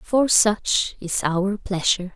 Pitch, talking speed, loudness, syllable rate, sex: 195 Hz, 140 wpm, -20 LUFS, 3.4 syllables/s, female